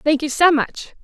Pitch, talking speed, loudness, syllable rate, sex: 300 Hz, 230 wpm, -17 LUFS, 4.4 syllables/s, female